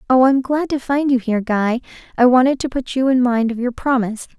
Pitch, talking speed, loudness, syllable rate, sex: 250 Hz, 260 wpm, -17 LUFS, 6.2 syllables/s, female